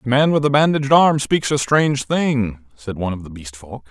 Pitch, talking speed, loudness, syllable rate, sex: 130 Hz, 245 wpm, -17 LUFS, 5.3 syllables/s, male